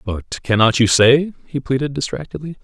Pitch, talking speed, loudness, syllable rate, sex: 130 Hz, 160 wpm, -17 LUFS, 5.3 syllables/s, male